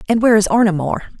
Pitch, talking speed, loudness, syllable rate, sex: 205 Hz, 200 wpm, -15 LUFS, 8.4 syllables/s, female